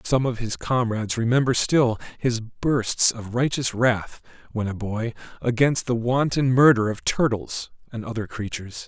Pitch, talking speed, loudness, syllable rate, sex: 120 Hz, 155 wpm, -23 LUFS, 4.5 syllables/s, male